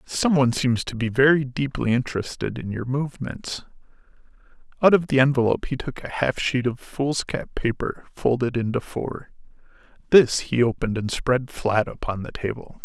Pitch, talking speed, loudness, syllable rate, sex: 125 Hz, 160 wpm, -23 LUFS, 5.1 syllables/s, male